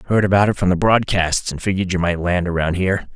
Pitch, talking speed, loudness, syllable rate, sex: 95 Hz, 245 wpm, -18 LUFS, 6.5 syllables/s, male